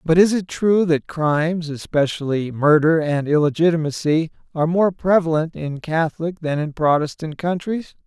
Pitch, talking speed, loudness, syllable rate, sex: 160 Hz, 140 wpm, -19 LUFS, 4.8 syllables/s, male